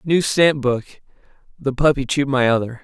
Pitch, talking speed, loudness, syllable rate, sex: 135 Hz, 170 wpm, -18 LUFS, 2.8 syllables/s, male